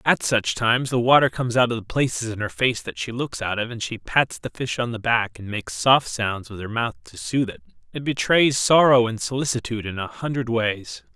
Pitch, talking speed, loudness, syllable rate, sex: 115 Hz, 240 wpm, -22 LUFS, 5.5 syllables/s, male